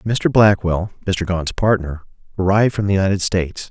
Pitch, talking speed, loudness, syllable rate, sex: 95 Hz, 160 wpm, -18 LUFS, 5.4 syllables/s, male